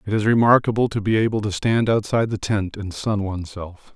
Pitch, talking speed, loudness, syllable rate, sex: 105 Hz, 210 wpm, -20 LUFS, 5.8 syllables/s, male